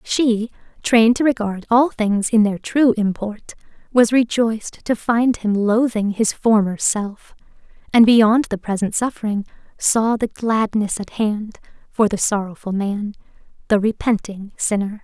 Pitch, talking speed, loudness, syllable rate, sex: 220 Hz, 145 wpm, -18 LUFS, 4.2 syllables/s, female